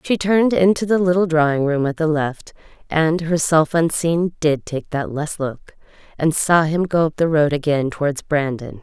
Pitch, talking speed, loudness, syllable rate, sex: 160 Hz, 190 wpm, -18 LUFS, 4.7 syllables/s, female